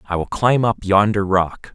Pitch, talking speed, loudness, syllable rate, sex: 100 Hz, 205 wpm, -18 LUFS, 4.7 syllables/s, male